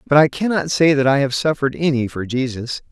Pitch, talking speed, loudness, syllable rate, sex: 140 Hz, 225 wpm, -18 LUFS, 5.9 syllables/s, male